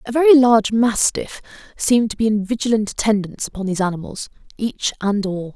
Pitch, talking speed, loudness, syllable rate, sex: 220 Hz, 175 wpm, -18 LUFS, 6.1 syllables/s, female